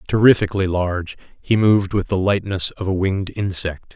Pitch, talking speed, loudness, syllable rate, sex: 95 Hz, 165 wpm, -19 LUFS, 5.6 syllables/s, male